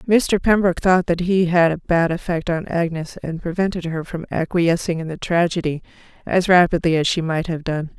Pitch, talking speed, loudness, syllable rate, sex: 170 Hz, 195 wpm, -19 LUFS, 5.1 syllables/s, female